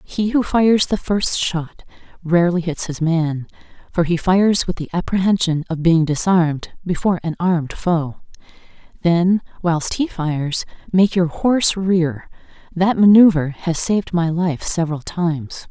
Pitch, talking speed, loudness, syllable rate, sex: 175 Hz, 150 wpm, -18 LUFS, 4.6 syllables/s, female